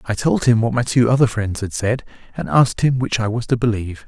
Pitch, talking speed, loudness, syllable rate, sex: 115 Hz, 265 wpm, -18 LUFS, 6.0 syllables/s, male